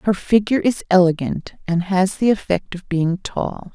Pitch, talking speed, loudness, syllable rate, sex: 190 Hz, 175 wpm, -19 LUFS, 4.5 syllables/s, female